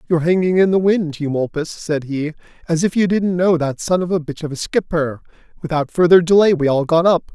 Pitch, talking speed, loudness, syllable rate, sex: 165 Hz, 230 wpm, -17 LUFS, 5.6 syllables/s, male